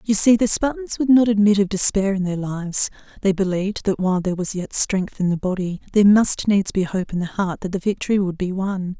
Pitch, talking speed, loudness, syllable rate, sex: 195 Hz, 245 wpm, -20 LUFS, 5.8 syllables/s, female